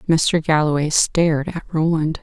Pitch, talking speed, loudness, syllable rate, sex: 155 Hz, 135 wpm, -18 LUFS, 4.4 syllables/s, female